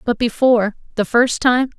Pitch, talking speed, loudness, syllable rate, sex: 235 Hz, 135 wpm, -17 LUFS, 5.0 syllables/s, female